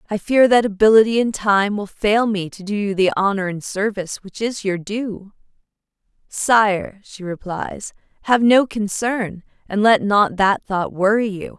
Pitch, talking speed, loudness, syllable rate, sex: 205 Hz, 170 wpm, -18 LUFS, 4.3 syllables/s, female